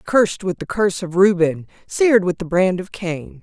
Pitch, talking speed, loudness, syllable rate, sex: 185 Hz, 210 wpm, -18 LUFS, 5.1 syllables/s, female